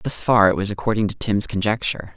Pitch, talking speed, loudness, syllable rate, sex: 105 Hz, 220 wpm, -19 LUFS, 6.2 syllables/s, male